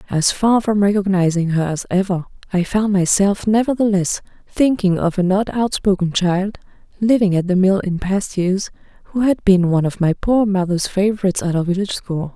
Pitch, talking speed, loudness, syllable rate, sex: 190 Hz, 180 wpm, -17 LUFS, 5.2 syllables/s, female